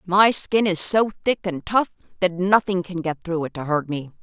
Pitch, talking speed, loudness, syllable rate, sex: 180 Hz, 225 wpm, -21 LUFS, 4.8 syllables/s, female